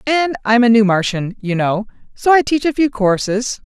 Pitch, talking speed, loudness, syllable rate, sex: 230 Hz, 195 wpm, -15 LUFS, 4.9 syllables/s, female